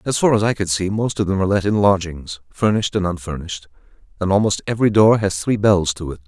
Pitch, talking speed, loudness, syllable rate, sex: 95 Hz, 240 wpm, -18 LUFS, 6.4 syllables/s, male